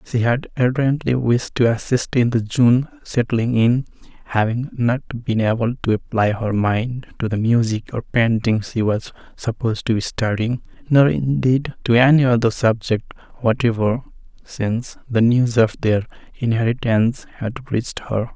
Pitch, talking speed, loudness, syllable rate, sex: 120 Hz, 150 wpm, -19 LUFS, 4.5 syllables/s, male